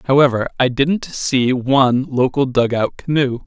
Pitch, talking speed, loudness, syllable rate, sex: 130 Hz, 140 wpm, -17 LUFS, 4.4 syllables/s, male